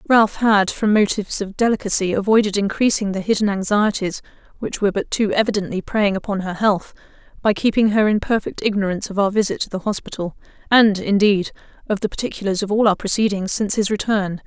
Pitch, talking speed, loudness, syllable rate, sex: 205 Hz, 185 wpm, -19 LUFS, 6.0 syllables/s, female